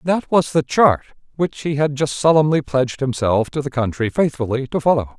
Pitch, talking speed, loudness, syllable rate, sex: 140 Hz, 195 wpm, -18 LUFS, 5.3 syllables/s, male